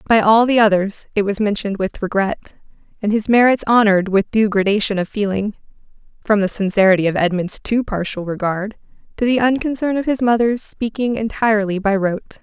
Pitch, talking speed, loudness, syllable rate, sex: 210 Hz, 170 wpm, -17 LUFS, 5.7 syllables/s, female